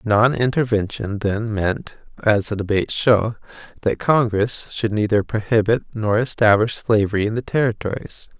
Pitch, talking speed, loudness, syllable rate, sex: 110 Hz, 135 wpm, -20 LUFS, 4.8 syllables/s, male